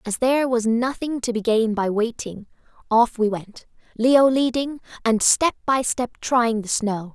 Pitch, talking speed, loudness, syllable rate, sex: 235 Hz, 175 wpm, -21 LUFS, 4.4 syllables/s, female